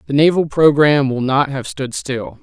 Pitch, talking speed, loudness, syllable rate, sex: 140 Hz, 200 wpm, -16 LUFS, 4.9 syllables/s, male